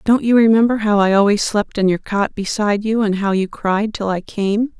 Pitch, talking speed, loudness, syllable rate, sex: 210 Hz, 240 wpm, -17 LUFS, 5.1 syllables/s, female